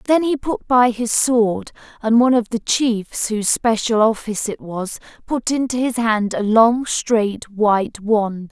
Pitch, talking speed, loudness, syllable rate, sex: 225 Hz, 175 wpm, -18 LUFS, 4.1 syllables/s, female